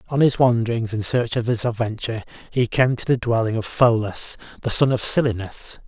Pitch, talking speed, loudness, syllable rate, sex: 115 Hz, 195 wpm, -21 LUFS, 5.5 syllables/s, male